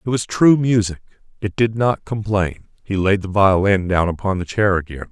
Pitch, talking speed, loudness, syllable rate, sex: 100 Hz, 200 wpm, -18 LUFS, 5.1 syllables/s, male